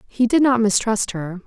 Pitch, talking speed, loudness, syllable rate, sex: 220 Hz, 205 wpm, -18 LUFS, 4.6 syllables/s, female